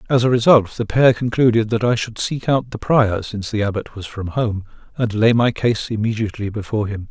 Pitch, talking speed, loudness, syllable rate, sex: 110 Hz, 220 wpm, -18 LUFS, 5.6 syllables/s, male